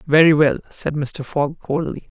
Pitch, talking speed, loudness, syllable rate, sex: 150 Hz, 165 wpm, -19 LUFS, 4.3 syllables/s, female